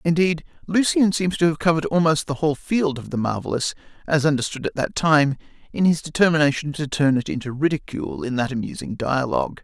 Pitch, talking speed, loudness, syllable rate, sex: 150 Hz, 185 wpm, -21 LUFS, 6.0 syllables/s, male